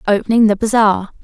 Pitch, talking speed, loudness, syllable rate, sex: 210 Hz, 145 wpm, -14 LUFS, 5.9 syllables/s, female